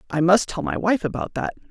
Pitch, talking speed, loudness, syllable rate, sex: 195 Hz, 245 wpm, -22 LUFS, 6.0 syllables/s, female